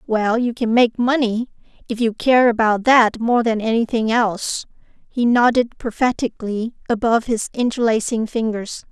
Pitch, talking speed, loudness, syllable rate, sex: 230 Hz, 140 wpm, -18 LUFS, 4.7 syllables/s, female